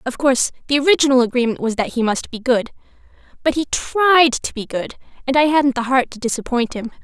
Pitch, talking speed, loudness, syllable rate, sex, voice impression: 260 Hz, 215 wpm, -18 LUFS, 6.0 syllables/s, female, feminine, young, tensed, bright, slightly soft, clear, fluent, slightly intellectual, friendly, lively, slightly kind